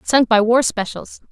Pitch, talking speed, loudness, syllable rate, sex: 230 Hz, 180 wpm, -16 LUFS, 4.4 syllables/s, female